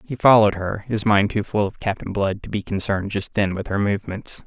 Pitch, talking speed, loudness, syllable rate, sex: 100 Hz, 240 wpm, -21 LUFS, 5.8 syllables/s, male